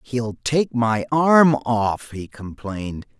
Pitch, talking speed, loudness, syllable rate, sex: 120 Hz, 130 wpm, -20 LUFS, 3.2 syllables/s, male